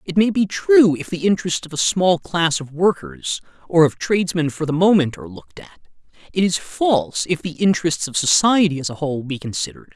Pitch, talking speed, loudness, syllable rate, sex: 165 Hz, 210 wpm, -19 LUFS, 5.7 syllables/s, male